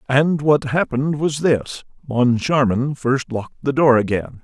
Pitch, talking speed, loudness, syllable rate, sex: 130 Hz, 150 wpm, -18 LUFS, 4.4 syllables/s, male